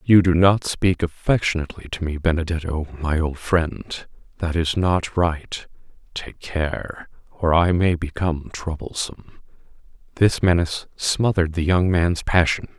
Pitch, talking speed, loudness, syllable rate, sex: 85 Hz, 130 wpm, -21 LUFS, 4.4 syllables/s, male